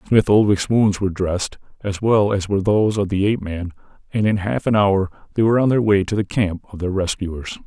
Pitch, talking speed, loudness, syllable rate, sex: 100 Hz, 235 wpm, -19 LUFS, 5.8 syllables/s, male